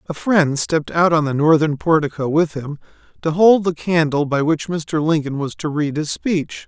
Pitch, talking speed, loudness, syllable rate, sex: 155 Hz, 205 wpm, -18 LUFS, 4.8 syllables/s, male